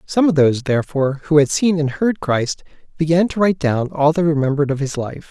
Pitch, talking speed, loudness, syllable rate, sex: 150 Hz, 225 wpm, -17 LUFS, 6.0 syllables/s, male